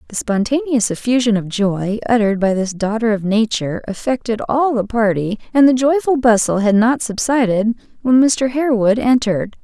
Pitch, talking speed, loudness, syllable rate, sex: 230 Hz, 160 wpm, -16 LUFS, 5.2 syllables/s, female